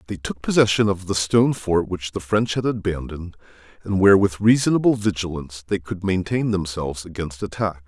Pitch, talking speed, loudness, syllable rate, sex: 95 Hz, 175 wpm, -21 LUFS, 5.8 syllables/s, male